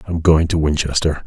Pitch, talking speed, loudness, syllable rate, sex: 80 Hz, 190 wpm, -17 LUFS, 5.5 syllables/s, male